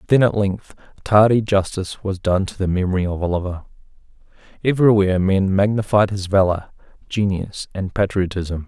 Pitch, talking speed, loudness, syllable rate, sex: 95 Hz, 140 wpm, -19 LUFS, 5.4 syllables/s, male